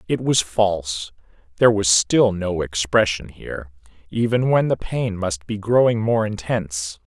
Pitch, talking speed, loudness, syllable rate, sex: 100 Hz, 150 wpm, -20 LUFS, 4.5 syllables/s, male